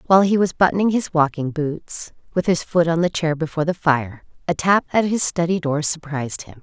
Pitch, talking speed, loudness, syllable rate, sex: 165 Hz, 215 wpm, -20 LUFS, 5.6 syllables/s, female